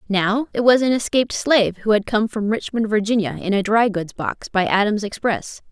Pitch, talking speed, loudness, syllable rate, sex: 215 Hz, 210 wpm, -19 LUFS, 5.2 syllables/s, female